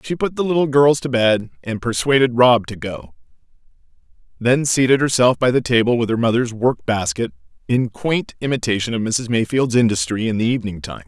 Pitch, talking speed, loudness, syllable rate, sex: 120 Hz, 185 wpm, -18 LUFS, 5.4 syllables/s, male